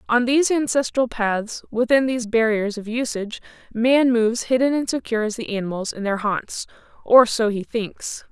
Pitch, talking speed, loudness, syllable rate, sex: 230 Hz, 165 wpm, -21 LUFS, 5.2 syllables/s, female